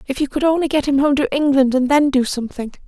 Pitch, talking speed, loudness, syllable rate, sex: 275 Hz, 270 wpm, -17 LUFS, 6.6 syllables/s, female